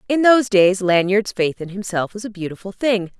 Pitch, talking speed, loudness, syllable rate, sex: 200 Hz, 205 wpm, -18 LUFS, 5.4 syllables/s, female